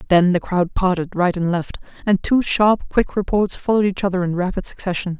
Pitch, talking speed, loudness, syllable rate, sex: 185 Hz, 210 wpm, -19 LUFS, 5.6 syllables/s, female